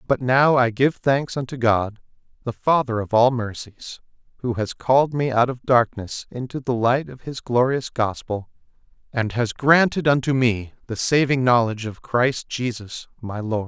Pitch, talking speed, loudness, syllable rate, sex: 125 Hz, 170 wpm, -21 LUFS, 4.5 syllables/s, male